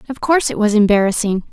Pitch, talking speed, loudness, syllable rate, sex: 220 Hz, 195 wpm, -15 LUFS, 6.9 syllables/s, female